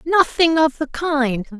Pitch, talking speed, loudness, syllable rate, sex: 290 Hz, 150 wpm, -18 LUFS, 3.6 syllables/s, female